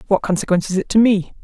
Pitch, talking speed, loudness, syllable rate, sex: 195 Hz, 295 wpm, -17 LUFS, 7.6 syllables/s, female